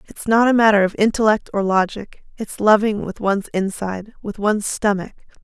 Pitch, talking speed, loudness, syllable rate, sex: 205 Hz, 175 wpm, -18 LUFS, 5.5 syllables/s, female